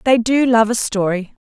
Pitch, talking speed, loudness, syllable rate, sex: 225 Hz, 205 wpm, -16 LUFS, 4.8 syllables/s, female